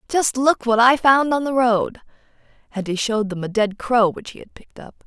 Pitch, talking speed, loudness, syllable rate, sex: 235 Hz, 225 wpm, -18 LUFS, 4.5 syllables/s, female